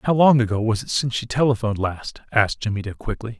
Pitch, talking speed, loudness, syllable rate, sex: 115 Hz, 230 wpm, -21 LUFS, 6.8 syllables/s, male